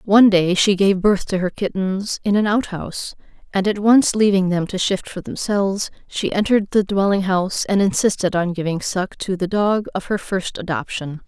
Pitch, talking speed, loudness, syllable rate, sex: 195 Hz, 200 wpm, -19 LUFS, 5.1 syllables/s, female